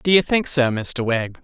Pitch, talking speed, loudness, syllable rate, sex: 140 Hz, 250 wpm, -19 LUFS, 4.4 syllables/s, male